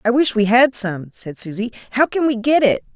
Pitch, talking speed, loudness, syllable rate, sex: 235 Hz, 245 wpm, -17 LUFS, 5.2 syllables/s, female